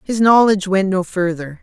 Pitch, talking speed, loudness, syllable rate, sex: 195 Hz, 185 wpm, -15 LUFS, 5.2 syllables/s, female